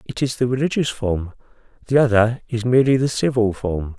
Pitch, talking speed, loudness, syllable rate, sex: 120 Hz, 180 wpm, -19 LUFS, 5.5 syllables/s, male